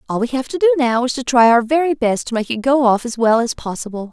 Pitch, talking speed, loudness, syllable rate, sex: 245 Hz, 305 wpm, -16 LUFS, 6.2 syllables/s, female